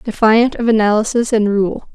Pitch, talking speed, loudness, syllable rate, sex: 220 Hz, 155 wpm, -14 LUFS, 4.9 syllables/s, female